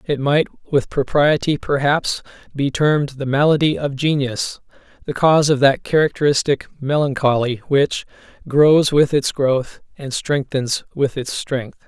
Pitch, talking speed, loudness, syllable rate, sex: 140 Hz, 135 wpm, -18 LUFS, 4.2 syllables/s, male